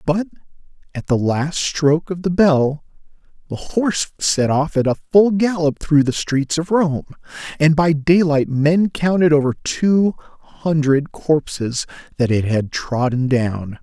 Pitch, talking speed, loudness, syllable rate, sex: 150 Hz, 150 wpm, -18 LUFS, 3.9 syllables/s, male